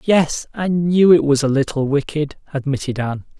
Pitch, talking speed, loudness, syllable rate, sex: 150 Hz, 175 wpm, -18 LUFS, 5.0 syllables/s, male